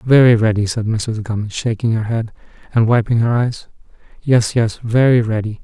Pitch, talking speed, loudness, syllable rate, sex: 115 Hz, 170 wpm, -16 LUFS, 5.1 syllables/s, male